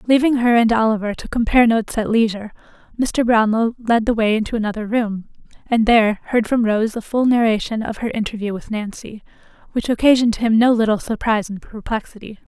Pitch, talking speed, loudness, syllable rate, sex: 225 Hz, 180 wpm, -18 LUFS, 6.0 syllables/s, female